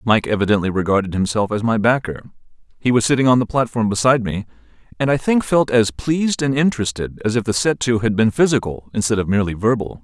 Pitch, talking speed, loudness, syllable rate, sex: 115 Hz, 195 wpm, -18 LUFS, 6.4 syllables/s, male